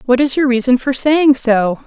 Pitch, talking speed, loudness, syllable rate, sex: 260 Hz, 225 wpm, -13 LUFS, 4.6 syllables/s, female